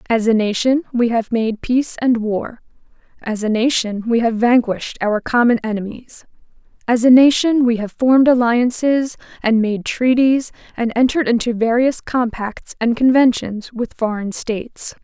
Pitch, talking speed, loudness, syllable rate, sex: 235 Hz, 150 wpm, -17 LUFS, 4.7 syllables/s, female